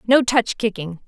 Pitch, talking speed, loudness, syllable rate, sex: 215 Hz, 165 wpm, -19 LUFS, 4.4 syllables/s, female